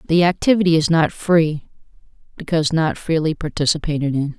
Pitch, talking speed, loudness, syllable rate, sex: 160 Hz, 135 wpm, -18 LUFS, 5.7 syllables/s, female